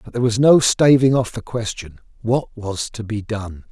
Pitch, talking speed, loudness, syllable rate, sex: 115 Hz, 210 wpm, -18 LUFS, 4.9 syllables/s, male